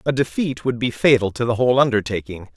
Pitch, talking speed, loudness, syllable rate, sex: 120 Hz, 210 wpm, -19 LUFS, 6.3 syllables/s, male